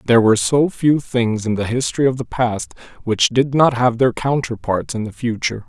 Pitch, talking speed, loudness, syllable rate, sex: 120 Hz, 220 wpm, -18 LUFS, 5.3 syllables/s, male